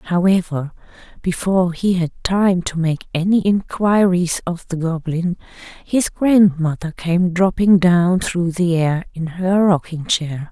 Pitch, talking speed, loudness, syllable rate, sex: 175 Hz, 135 wpm, -18 LUFS, 3.9 syllables/s, female